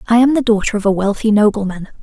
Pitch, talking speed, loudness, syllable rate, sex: 215 Hz, 235 wpm, -15 LUFS, 6.8 syllables/s, female